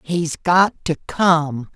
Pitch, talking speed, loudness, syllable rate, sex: 165 Hz, 135 wpm, -18 LUFS, 2.6 syllables/s, male